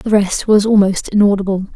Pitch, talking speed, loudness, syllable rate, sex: 200 Hz, 170 wpm, -14 LUFS, 5.4 syllables/s, female